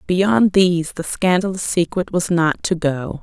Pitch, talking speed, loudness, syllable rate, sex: 175 Hz, 165 wpm, -18 LUFS, 4.2 syllables/s, female